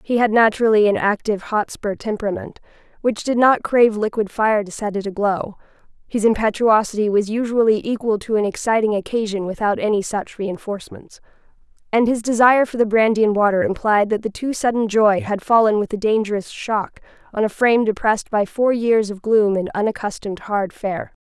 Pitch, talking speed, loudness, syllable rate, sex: 215 Hz, 180 wpm, -19 LUFS, 5.6 syllables/s, female